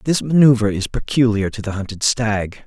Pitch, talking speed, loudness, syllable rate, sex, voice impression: 110 Hz, 180 wpm, -18 LUFS, 5.3 syllables/s, male, masculine, very adult-like, slightly thick, slightly muffled, cool, slightly sincere, slightly calm